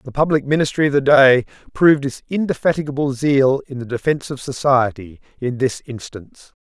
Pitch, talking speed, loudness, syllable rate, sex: 135 Hz, 165 wpm, -17 LUFS, 5.6 syllables/s, male